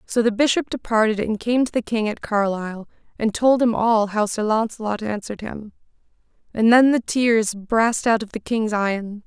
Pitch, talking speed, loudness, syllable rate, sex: 220 Hz, 195 wpm, -20 LUFS, 4.9 syllables/s, female